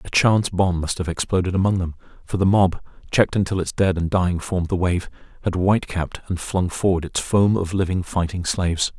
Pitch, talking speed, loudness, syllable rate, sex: 90 Hz, 215 wpm, -21 LUFS, 5.9 syllables/s, male